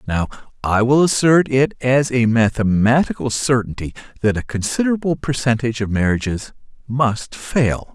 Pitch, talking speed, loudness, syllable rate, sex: 125 Hz, 130 wpm, -18 LUFS, 4.8 syllables/s, male